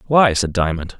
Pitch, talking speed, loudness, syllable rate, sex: 100 Hz, 180 wpm, -17 LUFS, 4.9 syllables/s, male